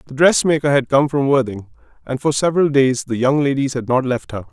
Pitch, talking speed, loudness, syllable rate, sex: 135 Hz, 225 wpm, -17 LUFS, 5.8 syllables/s, male